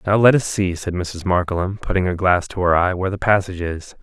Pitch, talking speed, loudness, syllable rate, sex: 90 Hz, 255 wpm, -19 LUFS, 6.1 syllables/s, male